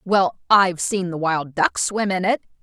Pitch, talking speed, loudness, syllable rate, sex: 175 Hz, 205 wpm, -20 LUFS, 4.4 syllables/s, female